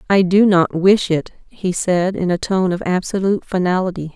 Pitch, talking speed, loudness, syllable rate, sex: 185 Hz, 190 wpm, -17 LUFS, 5.0 syllables/s, female